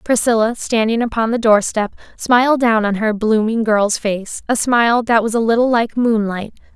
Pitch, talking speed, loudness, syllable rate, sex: 225 Hz, 185 wpm, -16 LUFS, 4.8 syllables/s, female